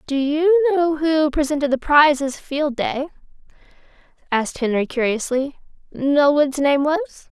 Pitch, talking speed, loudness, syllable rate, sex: 290 Hz, 140 wpm, -19 LUFS, 4.3 syllables/s, female